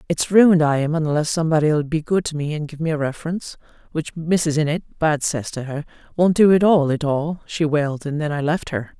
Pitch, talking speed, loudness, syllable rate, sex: 155 Hz, 235 wpm, -20 LUFS, 5.7 syllables/s, female